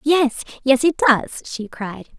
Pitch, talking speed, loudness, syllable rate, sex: 260 Hz, 165 wpm, -19 LUFS, 3.5 syllables/s, female